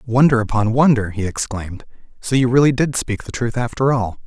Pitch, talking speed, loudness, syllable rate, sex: 120 Hz, 195 wpm, -18 LUFS, 5.6 syllables/s, male